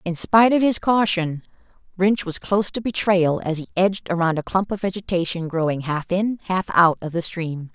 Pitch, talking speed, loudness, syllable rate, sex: 180 Hz, 200 wpm, -21 LUFS, 5.3 syllables/s, female